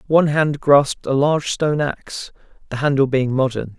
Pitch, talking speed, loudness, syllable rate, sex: 140 Hz, 160 wpm, -18 LUFS, 5.6 syllables/s, male